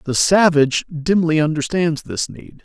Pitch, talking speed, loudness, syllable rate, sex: 160 Hz, 135 wpm, -17 LUFS, 4.5 syllables/s, male